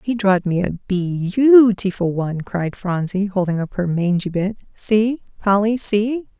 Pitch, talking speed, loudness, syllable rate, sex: 200 Hz, 170 wpm, -18 LUFS, 4.3 syllables/s, female